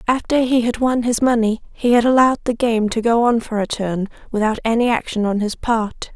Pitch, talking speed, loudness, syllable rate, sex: 230 Hz, 225 wpm, -18 LUFS, 5.4 syllables/s, female